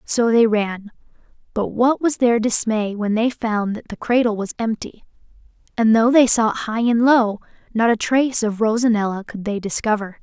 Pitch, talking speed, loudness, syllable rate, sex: 225 Hz, 180 wpm, -19 LUFS, 4.8 syllables/s, female